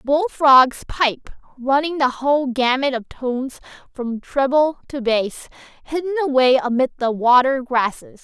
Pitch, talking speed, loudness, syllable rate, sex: 265 Hz, 130 wpm, -18 LUFS, 4.2 syllables/s, female